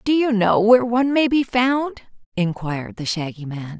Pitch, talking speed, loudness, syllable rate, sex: 215 Hz, 190 wpm, -19 LUFS, 4.9 syllables/s, female